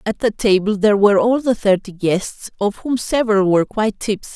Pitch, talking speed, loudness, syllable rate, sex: 210 Hz, 205 wpm, -17 LUFS, 5.8 syllables/s, female